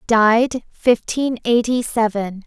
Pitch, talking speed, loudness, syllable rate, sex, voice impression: 230 Hz, 100 wpm, -18 LUFS, 3.6 syllables/s, female, very feminine, slightly young, slightly adult-like, very thin, slightly tensed, slightly weak, very bright, soft, very clear, fluent, slightly raspy, very cute, very intellectual, very refreshing, sincere, very calm, very friendly, very reassuring, very unique, elegant, sweet, lively, kind, slightly intense